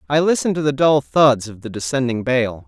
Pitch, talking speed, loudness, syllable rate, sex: 130 Hz, 225 wpm, -18 LUFS, 5.6 syllables/s, male